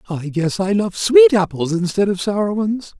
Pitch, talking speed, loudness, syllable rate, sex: 180 Hz, 200 wpm, -17 LUFS, 4.3 syllables/s, male